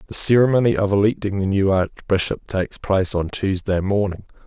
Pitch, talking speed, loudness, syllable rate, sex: 100 Hz, 160 wpm, -19 LUFS, 5.7 syllables/s, male